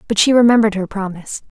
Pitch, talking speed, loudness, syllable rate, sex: 210 Hz, 195 wpm, -15 LUFS, 7.7 syllables/s, female